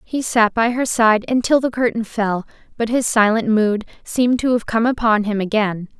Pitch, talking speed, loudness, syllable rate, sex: 225 Hz, 200 wpm, -18 LUFS, 4.9 syllables/s, female